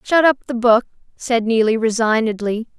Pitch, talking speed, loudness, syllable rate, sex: 230 Hz, 150 wpm, -17 LUFS, 4.8 syllables/s, female